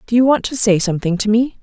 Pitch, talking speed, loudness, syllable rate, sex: 220 Hz, 295 wpm, -16 LUFS, 6.8 syllables/s, female